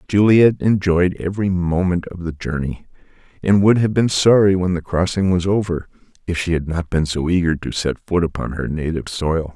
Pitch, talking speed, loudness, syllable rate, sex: 90 Hz, 195 wpm, -18 LUFS, 5.2 syllables/s, male